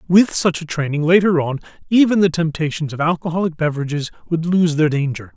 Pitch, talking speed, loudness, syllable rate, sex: 165 Hz, 180 wpm, -18 LUFS, 5.9 syllables/s, male